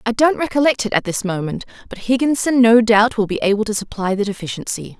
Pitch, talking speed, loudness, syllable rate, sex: 215 Hz, 215 wpm, -17 LUFS, 6.1 syllables/s, female